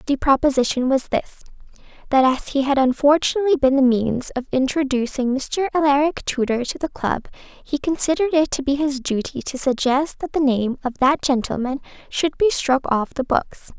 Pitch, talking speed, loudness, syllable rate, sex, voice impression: 275 Hz, 180 wpm, -20 LUFS, 5.1 syllables/s, female, very feminine, young, very thin, tensed, slightly weak, very bright, soft, clear, fluent, slightly raspy, very cute, intellectual, very refreshing, sincere, calm, very friendly, very reassuring, very unique, very elegant, very sweet, very lively, very kind, slightly intense, sharp, very light